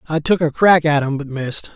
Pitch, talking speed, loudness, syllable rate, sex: 155 Hz, 275 wpm, -17 LUFS, 5.6 syllables/s, male